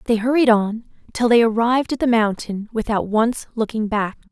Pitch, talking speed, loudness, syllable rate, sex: 225 Hz, 180 wpm, -19 LUFS, 5.2 syllables/s, female